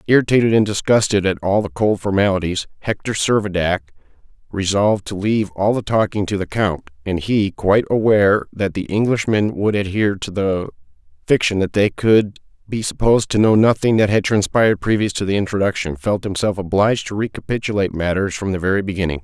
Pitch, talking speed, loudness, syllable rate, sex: 100 Hz, 175 wpm, -18 LUFS, 5.8 syllables/s, male